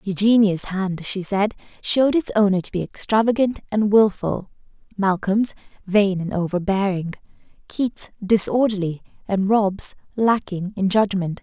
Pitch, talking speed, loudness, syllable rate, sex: 200 Hz, 120 wpm, -20 LUFS, 4.4 syllables/s, female